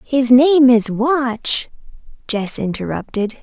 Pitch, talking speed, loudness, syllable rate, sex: 245 Hz, 105 wpm, -16 LUFS, 3.3 syllables/s, female